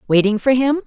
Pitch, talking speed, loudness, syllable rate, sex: 235 Hz, 210 wpm, -16 LUFS, 6.0 syllables/s, female